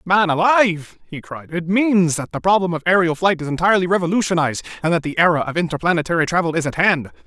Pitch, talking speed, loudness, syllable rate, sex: 170 Hz, 205 wpm, -18 LUFS, 6.6 syllables/s, male